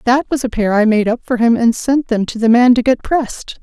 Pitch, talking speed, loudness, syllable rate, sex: 240 Hz, 300 wpm, -14 LUFS, 5.6 syllables/s, female